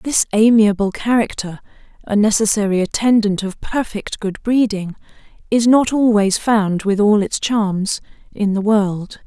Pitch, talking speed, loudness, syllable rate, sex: 210 Hz, 135 wpm, -17 LUFS, 4.2 syllables/s, female